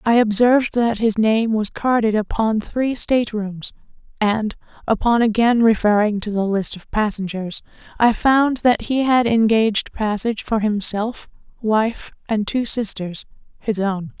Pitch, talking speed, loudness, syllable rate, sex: 220 Hz, 145 wpm, -19 LUFS, 4.3 syllables/s, female